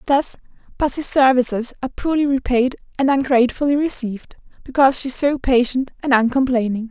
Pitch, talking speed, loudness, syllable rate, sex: 260 Hz, 140 wpm, -18 LUFS, 5.9 syllables/s, female